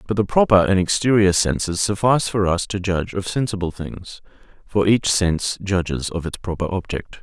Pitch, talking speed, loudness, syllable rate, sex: 95 Hz, 185 wpm, -20 LUFS, 5.3 syllables/s, male